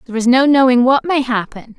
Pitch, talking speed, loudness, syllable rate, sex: 250 Hz, 235 wpm, -13 LUFS, 6.2 syllables/s, female